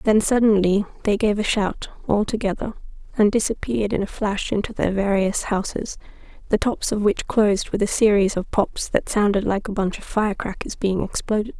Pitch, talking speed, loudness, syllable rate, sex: 205 Hz, 185 wpm, -21 LUFS, 5.3 syllables/s, female